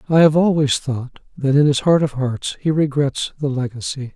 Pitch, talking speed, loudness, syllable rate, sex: 140 Hz, 200 wpm, -18 LUFS, 4.9 syllables/s, male